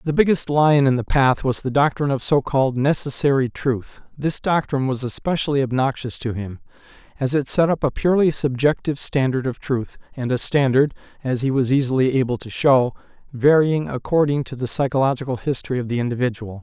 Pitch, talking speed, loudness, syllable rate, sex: 135 Hz, 170 wpm, -20 LUFS, 5.8 syllables/s, male